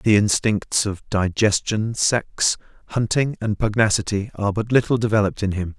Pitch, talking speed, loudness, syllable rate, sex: 105 Hz, 145 wpm, -21 LUFS, 5.0 syllables/s, male